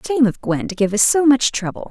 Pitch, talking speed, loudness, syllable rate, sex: 240 Hz, 285 wpm, -17 LUFS, 6.3 syllables/s, female